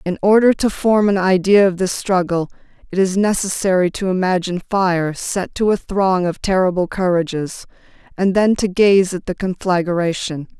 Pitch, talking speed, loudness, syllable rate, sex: 185 Hz, 165 wpm, -17 LUFS, 4.8 syllables/s, female